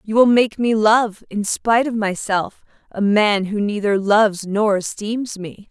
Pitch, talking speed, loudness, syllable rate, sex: 210 Hz, 180 wpm, -18 LUFS, 4.1 syllables/s, female